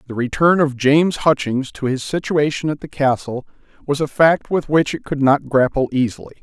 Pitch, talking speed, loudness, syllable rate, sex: 140 Hz, 195 wpm, -18 LUFS, 5.2 syllables/s, male